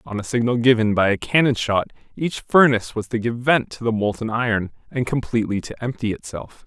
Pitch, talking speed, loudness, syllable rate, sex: 115 Hz, 205 wpm, -20 LUFS, 5.8 syllables/s, male